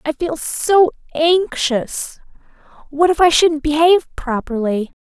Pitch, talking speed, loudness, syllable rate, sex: 310 Hz, 120 wpm, -16 LUFS, 3.9 syllables/s, female